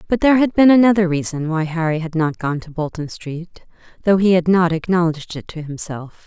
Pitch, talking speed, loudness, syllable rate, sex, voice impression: 170 Hz, 210 wpm, -18 LUFS, 5.6 syllables/s, female, very feminine, adult-like, slightly middle-aged, thin, slightly tensed, slightly weak, bright, soft, clear, fluent, slightly raspy, cool, very intellectual, refreshing, very sincere, calm, very friendly, very reassuring, slightly unique, elegant, very sweet, slightly lively, very kind, slightly modest